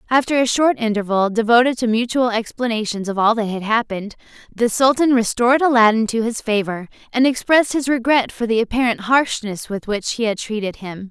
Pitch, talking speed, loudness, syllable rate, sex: 230 Hz, 185 wpm, -18 LUFS, 5.6 syllables/s, female